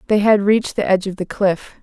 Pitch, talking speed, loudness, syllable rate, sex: 200 Hz, 265 wpm, -17 LUFS, 6.1 syllables/s, female